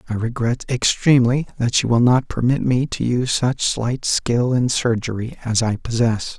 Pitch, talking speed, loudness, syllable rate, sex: 120 Hz, 180 wpm, -19 LUFS, 4.7 syllables/s, male